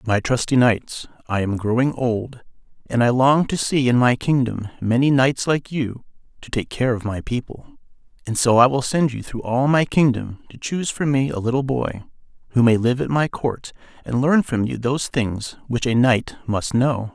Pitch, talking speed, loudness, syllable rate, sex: 125 Hz, 205 wpm, -20 LUFS, 4.7 syllables/s, male